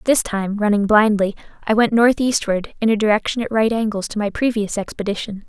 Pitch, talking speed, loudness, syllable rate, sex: 215 Hz, 185 wpm, -18 LUFS, 5.6 syllables/s, female